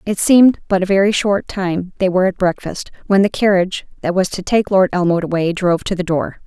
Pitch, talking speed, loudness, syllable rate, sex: 190 Hz, 230 wpm, -16 LUFS, 5.8 syllables/s, female